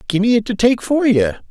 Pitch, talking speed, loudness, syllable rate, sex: 210 Hz, 240 wpm, -16 LUFS, 5.9 syllables/s, male